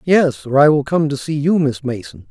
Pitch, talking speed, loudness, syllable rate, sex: 145 Hz, 260 wpm, -16 LUFS, 5.0 syllables/s, male